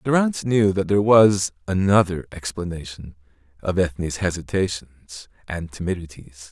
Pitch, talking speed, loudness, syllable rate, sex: 90 Hz, 110 wpm, -21 LUFS, 4.8 syllables/s, male